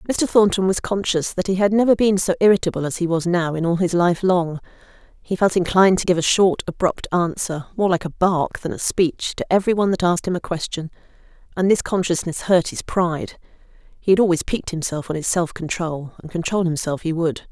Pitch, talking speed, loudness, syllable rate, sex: 175 Hz, 220 wpm, -20 LUFS, 5.8 syllables/s, female